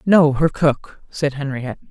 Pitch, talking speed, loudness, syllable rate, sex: 145 Hz, 125 wpm, -19 LUFS, 4.3 syllables/s, female